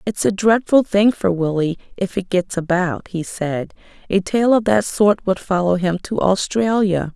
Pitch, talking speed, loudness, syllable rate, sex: 190 Hz, 185 wpm, -18 LUFS, 4.4 syllables/s, female